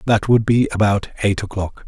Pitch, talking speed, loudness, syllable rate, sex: 105 Hz, 190 wpm, -18 LUFS, 5.2 syllables/s, male